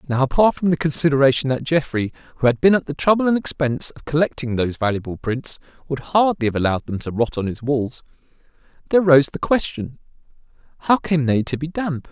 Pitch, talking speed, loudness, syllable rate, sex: 145 Hz, 200 wpm, -20 LUFS, 6.4 syllables/s, male